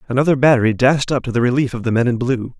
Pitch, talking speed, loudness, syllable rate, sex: 125 Hz, 275 wpm, -16 LUFS, 7.1 syllables/s, male